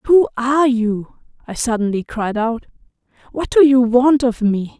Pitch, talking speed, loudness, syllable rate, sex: 245 Hz, 165 wpm, -16 LUFS, 4.5 syllables/s, female